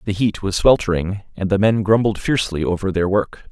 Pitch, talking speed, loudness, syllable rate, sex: 100 Hz, 205 wpm, -18 LUFS, 5.6 syllables/s, male